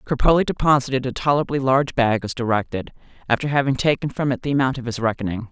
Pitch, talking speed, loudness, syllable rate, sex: 130 Hz, 195 wpm, -21 LUFS, 6.9 syllables/s, female